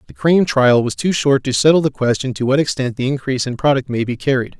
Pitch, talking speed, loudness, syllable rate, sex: 135 Hz, 260 wpm, -16 LUFS, 6.4 syllables/s, male